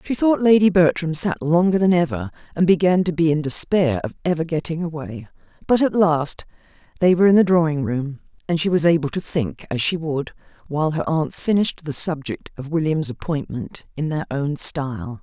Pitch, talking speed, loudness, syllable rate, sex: 160 Hz, 195 wpm, -20 LUFS, 5.3 syllables/s, female